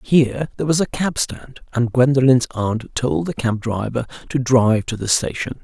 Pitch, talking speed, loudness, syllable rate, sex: 125 Hz, 190 wpm, -19 LUFS, 4.9 syllables/s, male